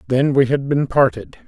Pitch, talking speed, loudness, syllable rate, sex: 140 Hz, 205 wpm, -17 LUFS, 4.9 syllables/s, male